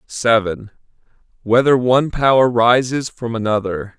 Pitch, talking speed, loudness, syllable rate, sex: 120 Hz, 105 wpm, -16 LUFS, 4.8 syllables/s, male